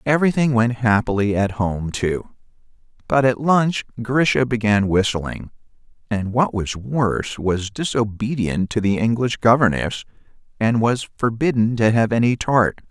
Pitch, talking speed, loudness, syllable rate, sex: 115 Hz, 135 wpm, -19 LUFS, 4.4 syllables/s, male